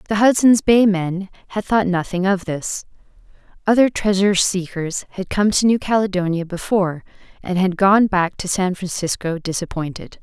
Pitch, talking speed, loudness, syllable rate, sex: 190 Hz, 155 wpm, -18 LUFS, 5.0 syllables/s, female